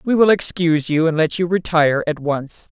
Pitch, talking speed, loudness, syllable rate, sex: 165 Hz, 215 wpm, -17 LUFS, 5.4 syllables/s, female